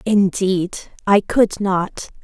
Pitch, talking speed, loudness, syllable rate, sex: 195 Hz, 105 wpm, -18 LUFS, 2.7 syllables/s, female